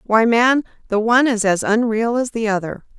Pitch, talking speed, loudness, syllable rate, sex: 225 Hz, 200 wpm, -17 LUFS, 5.2 syllables/s, female